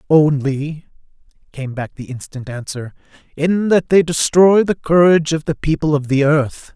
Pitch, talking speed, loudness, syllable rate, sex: 150 Hz, 160 wpm, -16 LUFS, 4.6 syllables/s, male